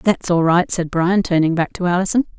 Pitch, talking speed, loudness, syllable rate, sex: 180 Hz, 225 wpm, -17 LUFS, 5.3 syllables/s, female